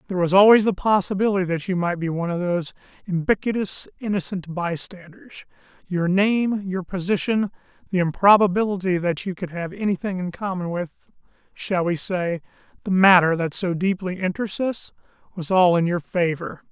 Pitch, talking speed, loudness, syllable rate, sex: 185 Hz, 150 wpm, -22 LUFS, 5.4 syllables/s, male